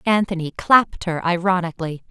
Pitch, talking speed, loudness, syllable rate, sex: 180 Hz, 115 wpm, -20 LUFS, 5.8 syllables/s, female